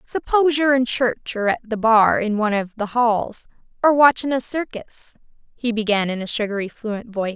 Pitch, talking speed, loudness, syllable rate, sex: 230 Hz, 190 wpm, -20 LUFS, 5.1 syllables/s, female